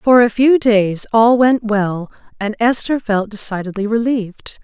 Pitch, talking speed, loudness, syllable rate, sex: 220 Hz, 155 wpm, -15 LUFS, 4.3 syllables/s, female